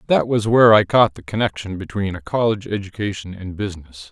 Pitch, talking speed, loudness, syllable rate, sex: 100 Hz, 190 wpm, -19 LUFS, 6.1 syllables/s, male